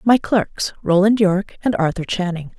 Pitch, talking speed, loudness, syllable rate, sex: 190 Hz, 140 wpm, -18 LUFS, 4.7 syllables/s, female